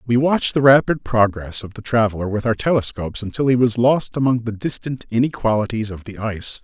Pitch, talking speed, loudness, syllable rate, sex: 115 Hz, 200 wpm, -19 LUFS, 5.9 syllables/s, male